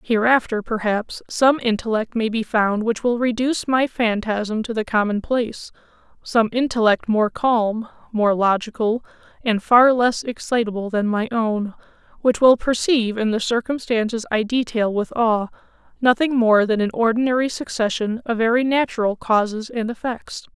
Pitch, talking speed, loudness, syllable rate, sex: 230 Hz, 145 wpm, -20 LUFS, 4.7 syllables/s, female